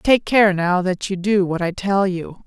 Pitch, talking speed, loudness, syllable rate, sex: 190 Hz, 245 wpm, -18 LUFS, 4.1 syllables/s, female